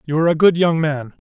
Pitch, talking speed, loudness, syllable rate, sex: 155 Hz, 285 wpm, -16 LUFS, 6.9 syllables/s, male